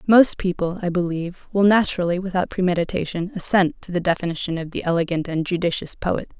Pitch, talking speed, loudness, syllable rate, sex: 180 Hz, 170 wpm, -21 LUFS, 6.1 syllables/s, female